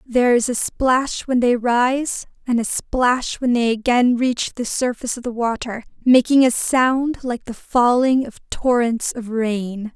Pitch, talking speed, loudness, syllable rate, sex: 240 Hz, 175 wpm, -19 LUFS, 4.0 syllables/s, female